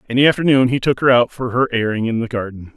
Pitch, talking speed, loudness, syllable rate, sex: 120 Hz, 285 wpm, -16 LUFS, 6.6 syllables/s, male